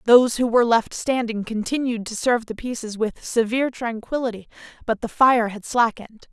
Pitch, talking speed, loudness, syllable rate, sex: 230 Hz, 170 wpm, -22 LUFS, 5.6 syllables/s, female